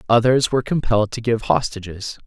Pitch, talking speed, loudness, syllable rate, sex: 115 Hz, 160 wpm, -19 LUFS, 5.9 syllables/s, male